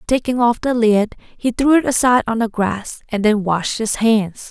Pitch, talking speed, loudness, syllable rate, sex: 225 Hz, 215 wpm, -17 LUFS, 4.5 syllables/s, female